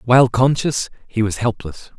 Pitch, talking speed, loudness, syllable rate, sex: 115 Hz, 150 wpm, -18 LUFS, 4.9 syllables/s, male